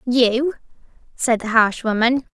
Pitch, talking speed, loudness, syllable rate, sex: 240 Hz, 130 wpm, -18 LUFS, 3.8 syllables/s, female